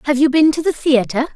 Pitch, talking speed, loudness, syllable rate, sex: 285 Hz, 265 wpm, -15 LUFS, 6.0 syllables/s, female